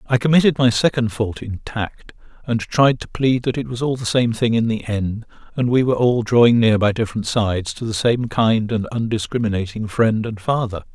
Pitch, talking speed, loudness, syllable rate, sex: 115 Hz, 215 wpm, -19 LUFS, 5.2 syllables/s, male